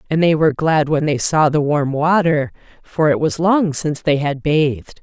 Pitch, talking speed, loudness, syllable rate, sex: 155 Hz, 215 wpm, -16 LUFS, 4.9 syllables/s, female